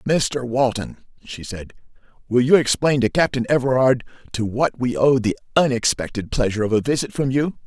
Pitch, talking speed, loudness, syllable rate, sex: 125 Hz, 170 wpm, -20 LUFS, 5.4 syllables/s, male